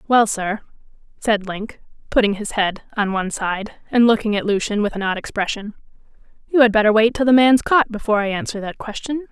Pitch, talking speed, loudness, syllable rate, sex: 215 Hz, 200 wpm, -19 LUFS, 5.7 syllables/s, female